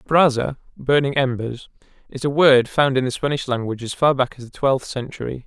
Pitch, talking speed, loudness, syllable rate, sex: 130 Hz, 200 wpm, -20 LUFS, 5.3 syllables/s, male